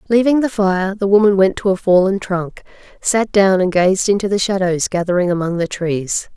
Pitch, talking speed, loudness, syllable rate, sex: 190 Hz, 200 wpm, -16 LUFS, 5.0 syllables/s, female